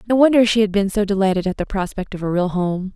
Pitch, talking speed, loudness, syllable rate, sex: 200 Hz, 285 wpm, -18 LUFS, 6.5 syllables/s, female